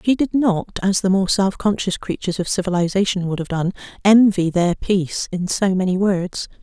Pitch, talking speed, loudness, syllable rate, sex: 190 Hz, 190 wpm, -19 LUFS, 5.2 syllables/s, female